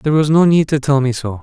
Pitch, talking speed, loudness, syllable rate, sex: 140 Hz, 335 wpm, -14 LUFS, 6.5 syllables/s, male